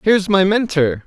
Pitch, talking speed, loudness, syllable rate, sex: 180 Hz, 170 wpm, -16 LUFS, 5.2 syllables/s, male